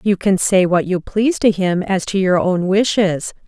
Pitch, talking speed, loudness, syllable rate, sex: 190 Hz, 225 wpm, -16 LUFS, 4.6 syllables/s, female